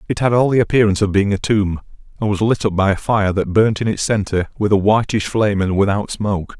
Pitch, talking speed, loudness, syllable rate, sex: 105 Hz, 255 wpm, -17 LUFS, 6.1 syllables/s, male